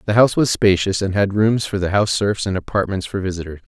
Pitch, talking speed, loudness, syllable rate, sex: 100 Hz, 240 wpm, -18 LUFS, 6.3 syllables/s, male